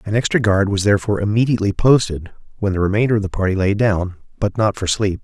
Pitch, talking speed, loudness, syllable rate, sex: 105 Hz, 220 wpm, -18 LUFS, 6.7 syllables/s, male